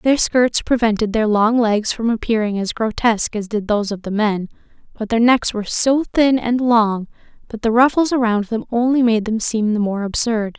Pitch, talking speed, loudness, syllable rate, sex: 225 Hz, 205 wpm, -17 LUFS, 5.1 syllables/s, female